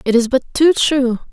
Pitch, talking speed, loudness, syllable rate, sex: 265 Hz, 225 wpm, -15 LUFS, 5.0 syllables/s, female